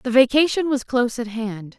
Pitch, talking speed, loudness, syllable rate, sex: 245 Hz, 200 wpm, -20 LUFS, 5.1 syllables/s, female